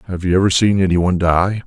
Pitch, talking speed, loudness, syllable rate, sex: 90 Hz, 250 wpm, -15 LUFS, 6.8 syllables/s, male